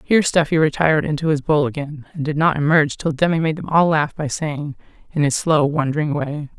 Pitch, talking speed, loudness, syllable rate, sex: 150 Hz, 220 wpm, -19 LUFS, 5.9 syllables/s, female